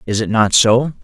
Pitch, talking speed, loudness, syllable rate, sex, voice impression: 115 Hz, 230 wpm, -13 LUFS, 4.9 syllables/s, male, masculine, adult-like, thick, tensed, slightly weak, clear, fluent, cool, intellectual, calm, wild, modest